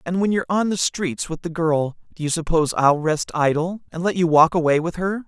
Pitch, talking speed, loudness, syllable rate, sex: 170 Hz, 250 wpm, -20 LUFS, 5.7 syllables/s, male